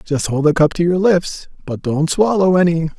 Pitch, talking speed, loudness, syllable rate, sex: 165 Hz, 220 wpm, -15 LUFS, 4.9 syllables/s, male